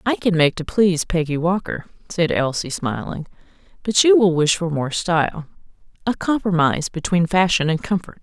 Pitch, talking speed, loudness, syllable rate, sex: 175 Hz, 160 wpm, -19 LUFS, 5.2 syllables/s, female